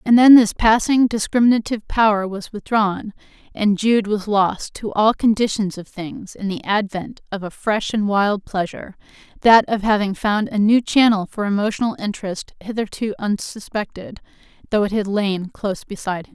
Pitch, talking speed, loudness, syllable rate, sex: 210 Hz, 165 wpm, -19 LUFS, 5.0 syllables/s, female